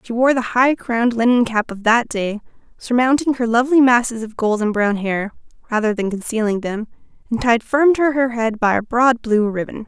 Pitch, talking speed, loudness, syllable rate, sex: 235 Hz, 200 wpm, -18 LUFS, 5.2 syllables/s, female